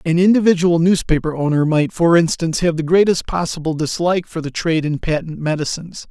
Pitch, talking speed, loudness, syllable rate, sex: 165 Hz, 175 wpm, -17 LUFS, 6.0 syllables/s, male